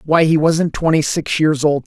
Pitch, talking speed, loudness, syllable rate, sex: 155 Hz, 225 wpm, -15 LUFS, 4.5 syllables/s, male